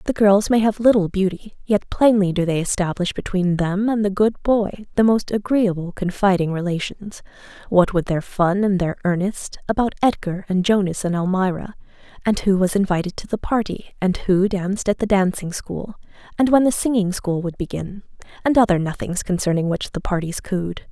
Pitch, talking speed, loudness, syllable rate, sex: 195 Hz, 185 wpm, -20 LUFS, 5.2 syllables/s, female